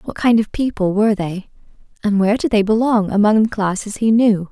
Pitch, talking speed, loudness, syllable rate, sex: 210 Hz, 215 wpm, -16 LUFS, 5.6 syllables/s, female